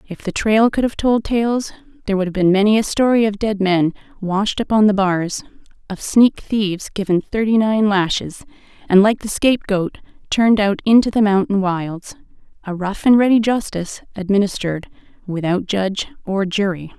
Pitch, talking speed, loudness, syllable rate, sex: 205 Hz, 170 wpm, -17 LUFS, 5.2 syllables/s, female